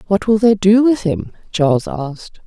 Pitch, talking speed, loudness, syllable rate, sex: 195 Hz, 195 wpm, -15 LUFS, 4.9 syllables/s, female